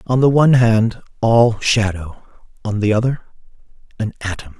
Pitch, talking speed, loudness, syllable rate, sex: 110 Hz, 145 wpm, -16 LUFS, 4.8 syllables/s, male